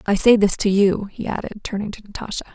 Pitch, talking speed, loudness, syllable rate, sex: 205 Hz, 235 wpm, -20 LUFS, 6.3 syllables/s, female